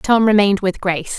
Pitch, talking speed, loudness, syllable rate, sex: 200 Hz, 205 wpm, -16 LUFS, 6.1 syllables/s, female